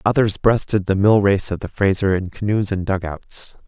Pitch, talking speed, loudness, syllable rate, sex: 100 Hz, 195 wpm, -19 LUFS, 4.8 syllables/s, male